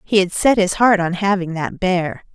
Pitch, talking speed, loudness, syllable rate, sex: 185 Hz, 230 wpm, -17 LUFS, 4.6 syllables/s, female